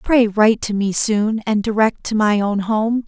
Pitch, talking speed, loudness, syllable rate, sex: 215 Hz, 215 wpm, -17 LUFS, 4.4 syllables/s, female